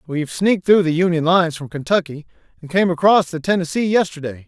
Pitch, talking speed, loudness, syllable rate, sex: 170 Hz, 190 wpm, -17 LUFS, 6.3 syllables/s, male